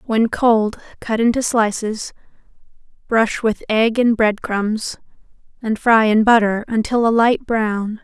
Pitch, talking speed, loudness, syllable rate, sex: 225 Hz, 140 wpm, -17 LUFS, 3.8 syllables/s, female